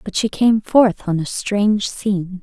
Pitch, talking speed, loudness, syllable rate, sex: 200 Hz, 200 wpm, -17 LUFS, 4.3 syllables/s, female